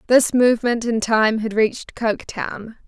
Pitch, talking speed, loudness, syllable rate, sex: 225 Hz, 145 wpm, -19 LUFS, 4.6 syllables/s, female